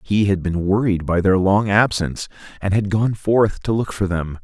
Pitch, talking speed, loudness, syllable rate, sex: 100 Hz, 215 wpm, -19 LUFS, 4.8 syllables/s, male